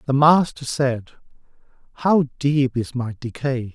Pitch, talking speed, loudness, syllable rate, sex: 135 Hz, 130 wpm, -21 LUFS, 3.8 syllables/s, male